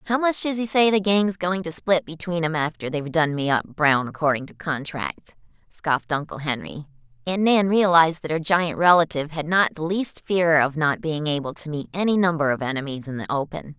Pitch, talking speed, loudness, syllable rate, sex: 165 Hz, 215 wpm, -22 LUFS, 5.4 syllables/s, female